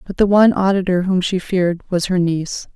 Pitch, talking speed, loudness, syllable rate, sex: 185 Hz, 220 wpm, -17 LUFS, 6.0 syllables/s, female